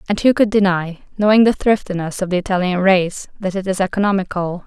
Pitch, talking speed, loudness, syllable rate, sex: 190 Hz, 195 wpm, -17 LUFS, 5.8 syllables/s, female